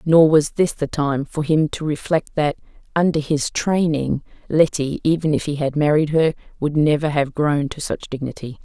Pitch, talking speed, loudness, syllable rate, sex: 150 Hz, 190 wpm, -20 LUFS, 4.7 syllables/s, female